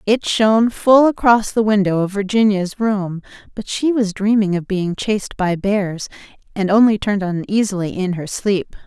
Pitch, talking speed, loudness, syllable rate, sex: 205 Hz, 170 wpm, -17 LUFS, 4.7 syllables/s, female